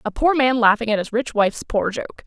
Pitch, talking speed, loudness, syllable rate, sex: 230 Hz, 265 wpm, -19 LUFS, 5.6 syllables/s, female